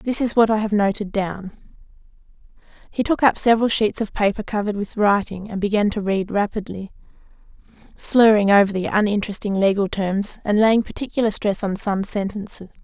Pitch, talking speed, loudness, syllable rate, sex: 205 Hz, 165 wpm, -20 LUFS, 5.6 syllables/s, female